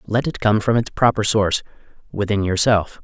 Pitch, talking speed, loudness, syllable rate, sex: 105 Hz, 160 wpm, -19 LUFS, 5.4 syllables/s, male